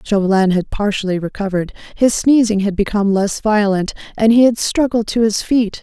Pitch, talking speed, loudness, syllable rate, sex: 210 Hz, 175 wpm, -16 LUFS, 5.5 syllables/s, female